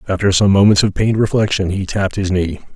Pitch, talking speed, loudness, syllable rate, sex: 100 Hz, 215 wpm, -15 LUFS, 6.5 syllables/s, male